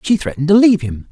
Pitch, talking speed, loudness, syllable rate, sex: 165 Hz, 270 wpm, -14 LUFS, 7.9 syllables/s, female